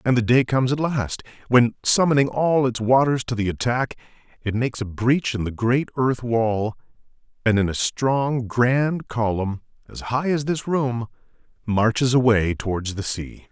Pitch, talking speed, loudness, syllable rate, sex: 120 Hz, 175 wpm, -21 LUFS, 4.5 syllables/s, male